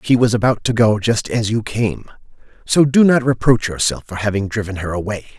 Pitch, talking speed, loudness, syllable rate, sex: 115 Hz, 210 wpm, -17 LUFS, 5.4 syllables/s, male